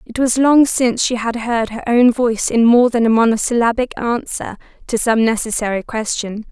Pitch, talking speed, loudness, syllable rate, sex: 230 Hz, 185 wpm, -16 LUFS, 5.2 syllables/s, female